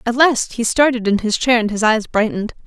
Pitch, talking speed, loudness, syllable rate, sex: 230 Hz, 245 wpm, -16 LUFS, 5.7 syllables/s, female